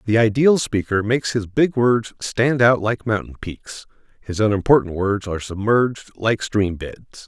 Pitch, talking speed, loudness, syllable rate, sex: 110 Hz, 165 wpm, -19 LUFS, 4.5 syllables/s, male